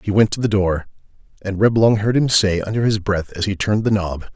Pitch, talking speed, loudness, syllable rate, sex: 100 Hz, 250 wpm, -18 LUFS, 5.7 syllables/s, male